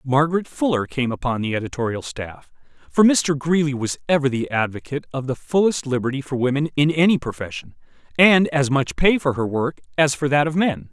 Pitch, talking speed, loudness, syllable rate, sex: 140 Hz, 190 wpm, -20 LUFS, 5.6 syllables/s, male